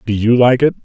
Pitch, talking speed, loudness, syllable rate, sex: 120 Hz, 285 wpm, -12 LUFS, 6.1 syllables/s, male